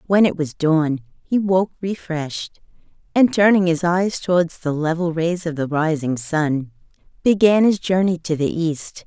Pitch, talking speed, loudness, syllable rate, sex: 170 Hz, 165 wpm, -19 LUFS, 4.4 syllables/s, female